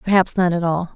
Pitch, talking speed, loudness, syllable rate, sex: 175 Hz, 250 wpm, -19 LUFS, 5.9 syllables/s, female